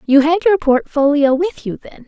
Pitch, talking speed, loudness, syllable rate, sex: 300 Hz, 200 wpm, -14 LUFS, 4.6 syllables/s, female